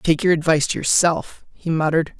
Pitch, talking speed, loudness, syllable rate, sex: 160 Hz, 190 wpm, -19 LUFS, 5.8 syllables/s, female